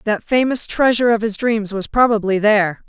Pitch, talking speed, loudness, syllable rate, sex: 220 Hz, 190 wpm, -16 LUFS, 5.5 syllables/s, female